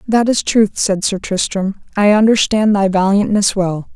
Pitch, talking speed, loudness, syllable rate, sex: 200 Hz, 165 wpm, -14 LUFS, 4.4 syllables/s, female